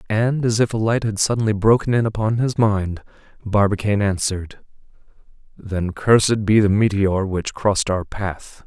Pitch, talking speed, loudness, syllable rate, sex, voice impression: 105 Hz, 160 wpm, -19 LUFS, 4.9 syllables/s, male, very masculine, adult-like, slightly middle-aged, very thick, relaxed, weak, dark, very soft, muffled, fluent, very cool, intellectual, slightly refreshing, very sincere, very calm, very mature, friendly, reassuring, unique, very elegant, slightly wild, very sweet, slightly lively, very kind, very modest